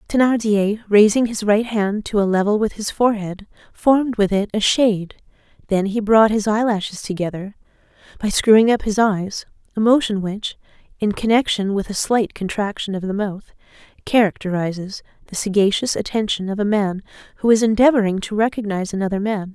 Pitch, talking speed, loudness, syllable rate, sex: 210 Hz, 165 wpm, -19 LUFS, 5.5 syllables/s, female